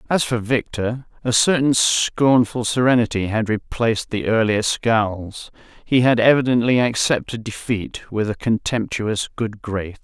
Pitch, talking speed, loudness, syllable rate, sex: 115 Hz, 130 wpm, -19 LUFS, 4.3 syllables/s, male